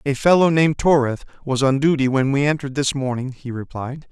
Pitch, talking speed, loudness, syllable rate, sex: 140 Hz, 205 wpm, -19 LUFS, 5.8 syllables/s, male